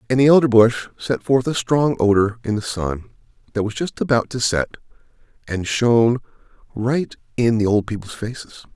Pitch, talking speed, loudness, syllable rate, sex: 115 Hz, 170 wpm, -19 LUFS, 5.3 syllables/s, male